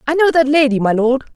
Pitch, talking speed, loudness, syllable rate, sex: 275 Hz, 265 wpm, -14 LUFS, 6.3 syllables/s, female